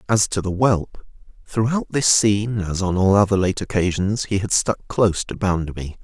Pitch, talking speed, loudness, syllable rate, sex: 100 Hz, 190 wpm, -20 LUFS, 5.0 syllables/s, male